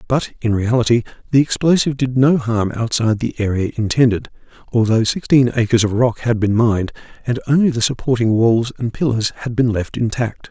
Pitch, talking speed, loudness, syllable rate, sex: 120 Hz, 175 wpm, -17 LUFS, 5.6 syllables/s, male